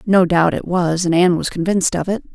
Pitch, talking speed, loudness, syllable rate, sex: 180 Hz, 255 wpm, -17 LUFS, 6.0 syllables/s, female